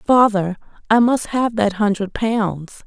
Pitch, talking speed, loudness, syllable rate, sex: 215 Hz, 145 wpm, -18 LUFS, 3.7 syllables/s, female